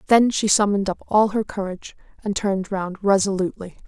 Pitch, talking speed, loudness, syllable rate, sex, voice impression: 200 Hz, 170 wpm, -21 LUFS, 6.0 syllables/s, female, feminine, slightly young, slightly relaxed, hard, fluent, slightly raspy, intellectual, lively, slightly strict, intense, sharp